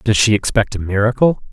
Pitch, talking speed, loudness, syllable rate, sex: 110 Hz, 195 wpm, -16 LUFS, 5.6 syllables/s, male